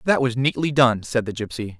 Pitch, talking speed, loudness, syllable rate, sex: 120 Hz, 235 wpm, -21 LUFS, 5.5 syllables/s, male